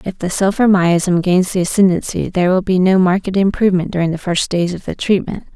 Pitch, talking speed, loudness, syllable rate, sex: 185 Hz, 215 wpm, -15 LUFS, 5.8 syllables/s, female